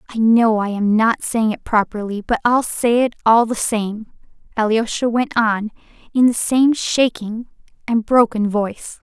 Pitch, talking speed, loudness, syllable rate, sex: 225 Hz, 165 wpm, -17 LUFS, 4.3 syllables/s, female